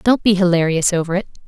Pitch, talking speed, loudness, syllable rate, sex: 185 Hz, 205 wpm, -16 LUFS, 6.7 syllables/s, female